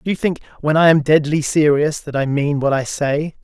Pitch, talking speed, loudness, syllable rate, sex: 150 Hz, 245 wpm, -17 LUFS, 5.2 syllables/s, male